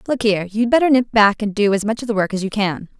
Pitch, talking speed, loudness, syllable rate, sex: 215 Hz, 320 wpm, -17 LUFS, 6.5 syllables/s, female